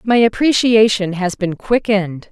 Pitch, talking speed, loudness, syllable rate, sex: 210 Hz, 130 wpm, -15 LUFS, 4.5 syllables/s, female